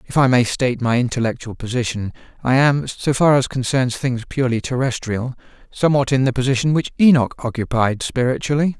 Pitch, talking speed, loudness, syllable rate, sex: 130 Hz, 165 wpm, -18 LUFS, 5.8 syllables/s, male